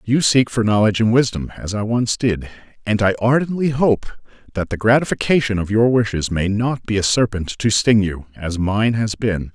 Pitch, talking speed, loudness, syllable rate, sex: 110 Hz, 200 wpm, -18 LUFS, 5.1 syllables/s, male